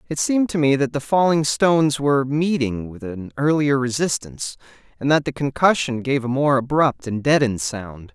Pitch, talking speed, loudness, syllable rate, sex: 135 Hz, 185 wpm, -20 LUFS, 5.2 syllables/s, male